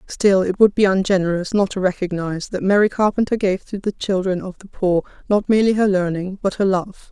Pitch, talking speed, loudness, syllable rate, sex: 190 Hz, 210 wpm, -19 LUFS, 5.7 syllables/s, female